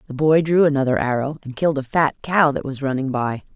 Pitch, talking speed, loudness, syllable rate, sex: 140 Hz, 235 wpm, -20 LUFS, 5.9 syllables/s, female